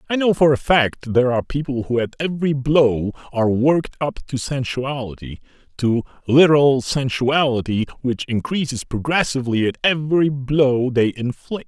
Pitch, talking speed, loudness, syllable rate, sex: 135 Hz, 145 wpm, -19 LUFS, 5.1 syllables/s, male